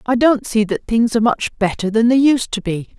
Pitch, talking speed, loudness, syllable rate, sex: 225 Hz, 260 wpm, -16 LUFS, 5.3 syllables/s, female